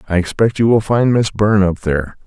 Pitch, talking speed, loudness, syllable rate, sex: 100 Hz, 240 wpm, -15 LUFS, 6.0 syllables/s, male